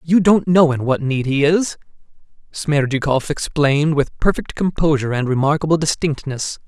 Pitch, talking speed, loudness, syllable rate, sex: 150 Hz, 145 wpm, -18 LUFS, 5.0 syllables/s, male